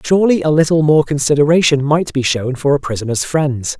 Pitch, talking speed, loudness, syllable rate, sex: 145 Hz, 190 wpm, -14 LUFS, 5.7 syllables/s, male